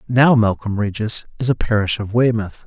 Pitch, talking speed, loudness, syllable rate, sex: 110 Hz, 180 wpm, -18 LUFS, 5.5 syllables/s, male